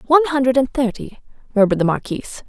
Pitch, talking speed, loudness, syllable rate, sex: 245 Hz, 170 wpm, -18 LUFS, 7.1 syllables/s, female